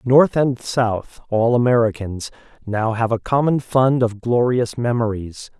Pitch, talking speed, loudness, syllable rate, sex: 120 Hz, 140 wpm, -19 LUFS, 4.0 syllables/s, male